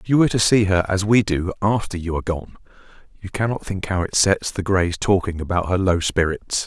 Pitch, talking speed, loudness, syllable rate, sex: 95 Hz, 235 wpm, -20 LUFS, 5.8 syllables/s, male